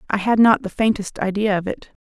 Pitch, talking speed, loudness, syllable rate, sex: 205 Hz, 235 wpm, -19 LUFS, 5.7 syllables/s, female